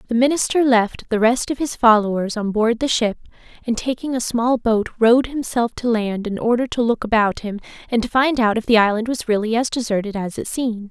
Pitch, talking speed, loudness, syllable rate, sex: 230 Hz, 225 wpm, -19 LUFS, 5.5 syllables/s, female